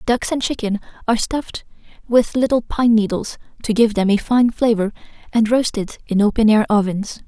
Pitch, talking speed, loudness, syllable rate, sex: 225 Hz, 175 wpm, -18 LUFS, 5.3 syllables/s, female